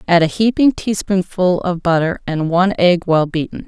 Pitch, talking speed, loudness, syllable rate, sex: 180 Hz, 180 wpm, -16 LUFS, 5.3 syllables/s, female